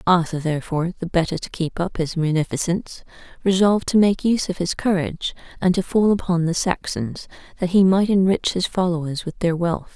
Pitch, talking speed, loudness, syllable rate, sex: 175 Hz, 185 wpm, -21 LUFS, 5.7 syllables/s, female